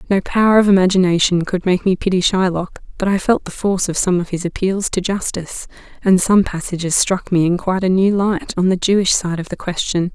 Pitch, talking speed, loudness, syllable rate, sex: 185 Hz, 225 wpm, -16 LUFS, 5.8 syllables/s, female